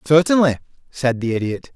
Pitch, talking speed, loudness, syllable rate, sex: 140 Hz, 135 wpm, -18 LUFS, 5.3 syllables/s, male